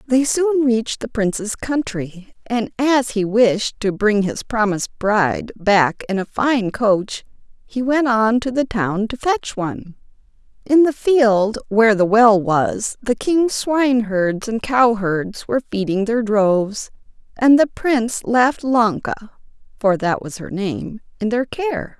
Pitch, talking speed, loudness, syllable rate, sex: 225 Hz, 160 wpm, -18 LUFS, 3.8 syllables/s, female